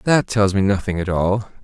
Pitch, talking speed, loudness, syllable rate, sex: 100 Hz, 220 wpm, -19 LUFS, 4.7 syllables/s, male